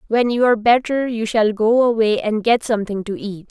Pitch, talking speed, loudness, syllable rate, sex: 225 Hz, 205 wpm, -17 LUFS, 5.1 syllables/s, female